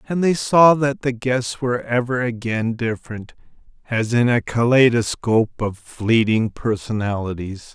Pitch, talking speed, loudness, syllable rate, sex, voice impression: 120 Hz, 130 wpm, -19 LUFS, 4.4 syllables/s, male, masculine, middle-aged, thick, tensed, powerful, slightly hard, clear, cool, calm, mature, slightly friendly, wild, lively, strict